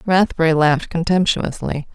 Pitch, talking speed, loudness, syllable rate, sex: 165 Hz, 95 wpm, -18 LUFS, 5.1 syllables/s, female